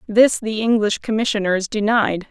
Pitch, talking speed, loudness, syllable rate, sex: 215 Hz, 130 wpm, -18 LUFS, 4.7 syllables/s, female